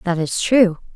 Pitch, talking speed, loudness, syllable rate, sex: 190 Hz, 190 wpm, -17 LUFS, 4.4 syllables/s, female